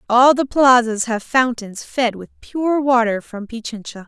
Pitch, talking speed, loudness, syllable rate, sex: 235 Hz, 160 wpm, -17 LUFS, 4.2 syllables/s, female